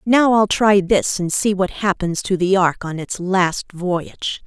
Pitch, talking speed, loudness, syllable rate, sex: 185 Hz, 200 wpm, -18 LUFS, 3.9 syllables/s, female